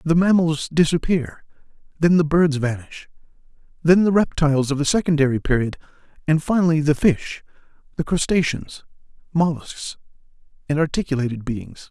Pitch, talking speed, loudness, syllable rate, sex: 155 Hz, 120 wpm, -20 LUFS, 5.1 syllables/s, male